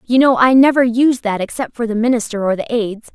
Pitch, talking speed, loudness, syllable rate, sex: 235 Hz, 250 wpm, -15 LUFS, 6.1 syllables/s, female